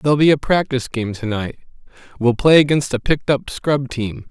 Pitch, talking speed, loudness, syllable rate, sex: 130 Hz, 210 wpm, -18 LUFS, 5.5 syllables/s, male